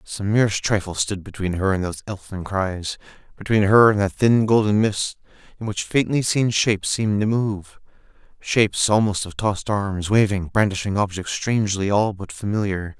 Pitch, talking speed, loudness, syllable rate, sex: 100 Hz, 165 wpm, -21 LUFS, 5.1 syllables/s, male